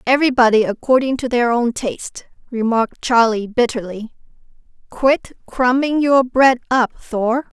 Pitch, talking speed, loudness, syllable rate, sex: 245 Hz, 120 wpm, -17 LUFS, 4.5 syllables/s, female